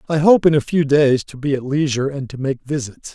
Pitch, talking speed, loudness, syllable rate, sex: 140 Hz, 265 wpm, -18 LUFS, 5.8 syllables/s, male